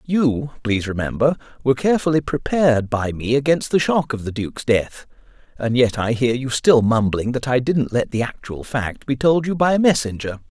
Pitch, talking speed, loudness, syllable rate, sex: 130 Hz, 200 wpm, -19 LUFS, 5.3 syllables/s, male